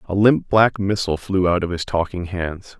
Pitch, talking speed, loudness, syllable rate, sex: 95 Hz, 215 wpm, -20 LUFS, 5.0 syllables/s, male